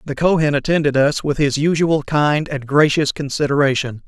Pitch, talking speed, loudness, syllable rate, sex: 145 Hz, 160 wpm, -17 LUFS, 5.2 syllables/s, male